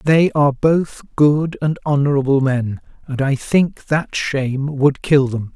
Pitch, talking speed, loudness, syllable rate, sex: 140 Hz, 160 wpm, -17 LUFS, 4.0 syllables/s, male